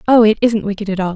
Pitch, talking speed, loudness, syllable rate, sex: 210 Hz, 310 wpm, -15 LUFS, 7.4 syllables/s, female